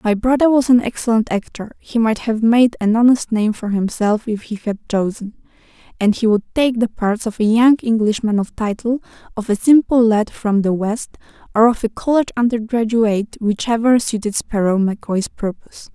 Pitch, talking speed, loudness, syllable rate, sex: 225 Hz, 180 wpm, -17 LUFS, 4.3 syllables/s, female